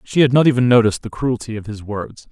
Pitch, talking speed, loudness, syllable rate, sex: 115 Hz, 260 wpm, -17 LUFS, 6.3 syllables/s, male